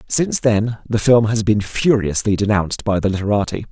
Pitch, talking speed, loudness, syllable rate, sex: 105 Hz, 180 wpm, -17 LUFS, 5.4 syllables/s, male